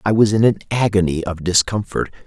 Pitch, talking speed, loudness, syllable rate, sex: 100 Hz, 185 wpm, -18 LUFS, 5.5 syllables/s, male